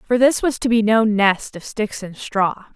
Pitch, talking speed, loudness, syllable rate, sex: 220 Hz, 240 wpm, -18 LUFS, 4.2 syllables/s, female